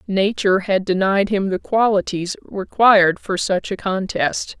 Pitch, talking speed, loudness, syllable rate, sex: 195 Hz, 145 wpm, -18 LUFS, 4.3 syllables/s, female